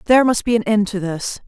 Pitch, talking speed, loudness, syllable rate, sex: 215 Hz, 285 wpm, -18 LUFS, 6.4 syllables/s, female